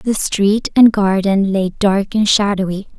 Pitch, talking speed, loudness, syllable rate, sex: 200 Hz, 160 wpm, -14 LUFS, 3.9 syllables/s, female